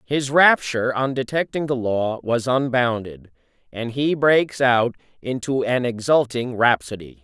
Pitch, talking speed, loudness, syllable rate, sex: 125 Hz, 135 wpm, -20 LUFS, 4.2 syllables/s, male